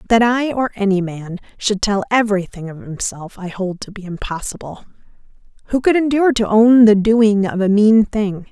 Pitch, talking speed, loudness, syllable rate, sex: 210 Hz, 185 wpm, -16 LUFS, 5.0 syllables/s, female